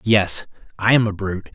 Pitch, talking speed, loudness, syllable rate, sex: 100 Hz, 195 wpm, -19 LUFS, 5.3 syllables/s, male